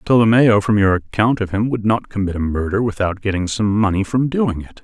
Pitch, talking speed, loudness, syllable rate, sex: 105 Hz, 225 wpm, -17 LUFS, 5.5 syllables/s, male